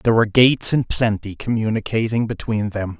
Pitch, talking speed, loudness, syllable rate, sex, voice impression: 110 Hz, 160 wpm, -19 LUFS, 5.9 syllables/s, male, very masculine, slightly old, thick, muffled, cool, sincere, calm, slightly wild, slightly kind